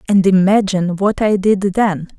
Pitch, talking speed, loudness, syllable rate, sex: 195 Hz, 165 wpm, -15 LUFS, 4.5 syllables/s, female